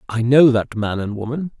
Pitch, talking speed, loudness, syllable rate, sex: 120 Hz, 225 wpm, -17 LUFS, 5.1 syllables/s, male